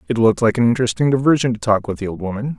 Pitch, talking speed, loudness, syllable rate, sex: 115 Hz, 280 wpm, -18 LUFS, 7.9 syllables/s, male